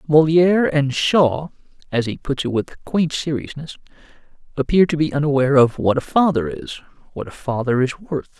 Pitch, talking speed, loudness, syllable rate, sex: 145 Hz, 170 wpm, -19 LUFS, 5.2 syllables/s, male